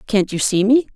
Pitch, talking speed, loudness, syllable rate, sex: 215 Hz, 250 wpm, -17 LUFS, 5.2 syllables/s, female